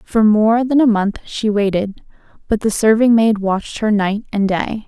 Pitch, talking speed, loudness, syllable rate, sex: 215 Hz, 195 wpm, -16 LUFS, 4.5 syllables/s, female